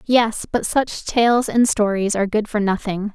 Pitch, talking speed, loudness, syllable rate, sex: 215 Hz, 190 wpm, -19 LUFS, 4.3 syllables/s, female